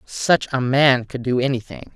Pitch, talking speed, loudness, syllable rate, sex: 130 Hz, 185 wpm, -19 LUFS, 4.5 syllables/s, female